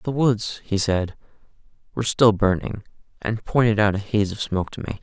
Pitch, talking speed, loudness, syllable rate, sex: 105 Hz, 190 wpm, -22 LUFS, 5.3 syllables/s, male